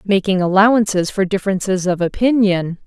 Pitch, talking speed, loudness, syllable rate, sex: 195 Hz, 125 wpm, -16 LUFS, 5.5 syllables/s, female